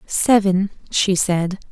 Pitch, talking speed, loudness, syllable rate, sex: 190 Hz, 105 wpm, -18 LUFS, 3.1 syllables/s, female